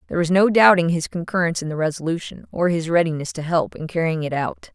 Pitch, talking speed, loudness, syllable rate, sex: 165 Hz, 230 wpm, -20 LUFS, 6.4 syllables/s, female